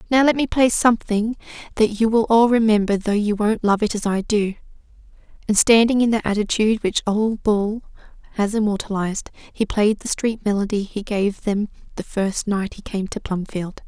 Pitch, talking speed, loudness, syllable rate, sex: 210 Hz, 185 wpm, -20 LUFS, 5.2 syllables/s, female